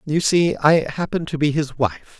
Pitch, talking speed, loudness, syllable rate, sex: 150 Hz, 220 wpm, -19 LUFS, 5.0 syllables/s, male